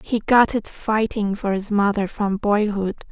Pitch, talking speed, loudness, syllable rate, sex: 205 Hz, 175 wpm, -20 LUFS, 4.2 syllables/s, female